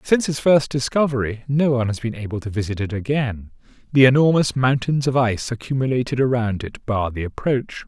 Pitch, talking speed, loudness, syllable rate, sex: 125 Hz, 185 wpm, -20 LUFS, 5.7 syllables/s, male